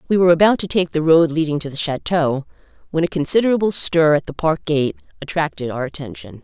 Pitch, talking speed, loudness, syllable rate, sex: 160 Hz, 205 wpm, -18 LUFS, 6.1 syllables/s, female